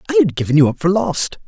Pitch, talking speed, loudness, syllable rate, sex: 145 Hz, 285 wpm, -16 LUFS, 6.7 syllables/s, male